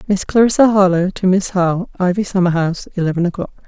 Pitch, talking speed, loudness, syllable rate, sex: 185 Hz, 180 wpm, -15 LUFS, 6.7 syllables/s, female